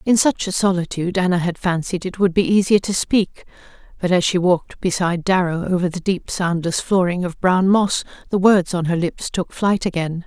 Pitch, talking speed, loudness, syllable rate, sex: 180 Hz, 205 wpm, -19 LUFS, 5.3 syllables/s, female